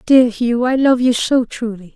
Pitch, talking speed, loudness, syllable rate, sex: 240 Hz, 215 wpm, -15 LUFS, 4.4 syllables/s, female